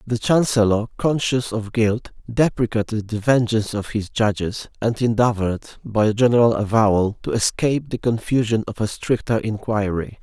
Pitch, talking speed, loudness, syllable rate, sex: 110 Hz, 145 wpm, -20 LUFS, 5.0 syllables/s, male